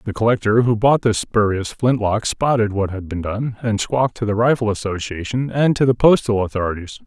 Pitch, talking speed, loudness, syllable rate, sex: 110 Hz, 195 wpm, -18 LUFS, 5.4 syllables/s, male